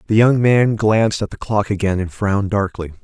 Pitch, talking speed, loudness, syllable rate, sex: 105 Hz, 220 wpm, -17 LUFS, 5.4 syllables/s, male